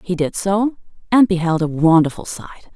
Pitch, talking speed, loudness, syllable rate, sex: 180 Hz, 175 wpm, -17 LUFS, 5.4 syllables/s, female